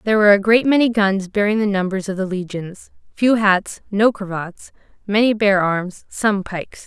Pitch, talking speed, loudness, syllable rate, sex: 200 Hz, 185 wpm, -18 LUFS, 4.9 syllables/s, female